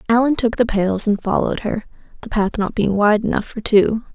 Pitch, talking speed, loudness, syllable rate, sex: 215 Hz, 215 wpm, -18 LUFS, 5.4 syllables/s, female